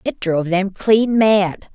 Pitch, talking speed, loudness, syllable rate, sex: 200 Hz, 170 wpm, -16 LUFS, 3.9 syllables/s, female